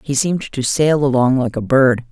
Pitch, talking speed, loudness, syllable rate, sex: 135 Hz, 225 wpm, -16 LUFS, 5.1 syllables/s, female